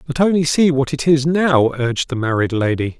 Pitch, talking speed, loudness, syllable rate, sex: 140 Hz, 220 wpm, -17 LUFS, 5.3 syllables/s, male